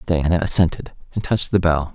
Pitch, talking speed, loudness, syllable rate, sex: 85 Hz, 185 wpm, -19 LUFS, 6.3 syllables/s, male